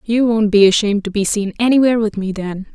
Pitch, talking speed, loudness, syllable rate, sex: 210 Hz, 240 wpm, -15 LUFS, 6.3 syllables/s, female